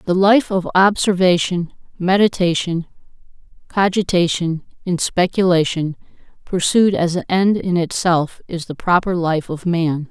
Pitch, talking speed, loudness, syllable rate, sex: 175 Hz, 120 wpm, -17 LUFS, 4.3 syllables/s, female